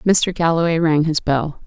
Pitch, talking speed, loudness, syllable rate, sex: 160 Hz, 180 wpm, -17 LUFS, 4.4 syllables/s, female